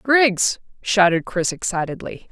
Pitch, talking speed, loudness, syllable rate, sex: 200 Hz, 105 wpm, -19 LUFS, 4.0 syllables/s, female